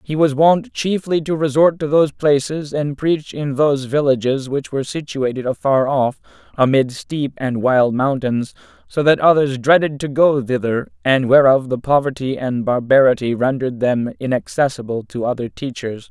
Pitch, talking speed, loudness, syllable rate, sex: 135 Hz, 160 wpm, -17 LUFS, 4.9 syllables/s, male